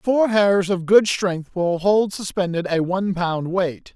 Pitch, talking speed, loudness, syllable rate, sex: 185 Hz, 180 wpm, -20 LUFS, 3.9 syllables/s, male